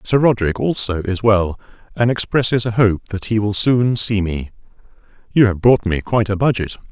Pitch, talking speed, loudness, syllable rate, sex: 105 Hz, 190 wpm, -17 LUFS, 5.2 syllables/s, male